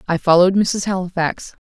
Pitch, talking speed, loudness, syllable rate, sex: 180 Hz, 145 wpm, -17 LUFS, 5.6 syllables/s, female